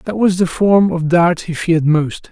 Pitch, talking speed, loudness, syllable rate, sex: 175 Hz, 235 wpm, -14 LUFS, 4.4 syllables/s, male